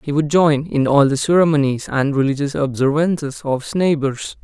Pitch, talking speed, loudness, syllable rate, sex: 145 Hz, 175 wpm, -17 LUFS, 5.2 syllables/s, male